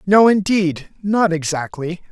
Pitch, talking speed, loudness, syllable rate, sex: 180 Hz, 115 wpm, -17 LUFS, 3.8 syllables/s, male